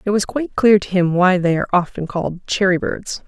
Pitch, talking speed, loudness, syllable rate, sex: 190 Hz, 220 wpm, -17 LUFS, 5.9 syllables/s, female